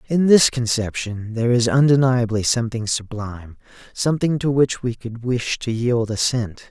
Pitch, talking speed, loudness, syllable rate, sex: 120 Hz, 150 wpm, -19 LUFS, 4.9 syllables/s, male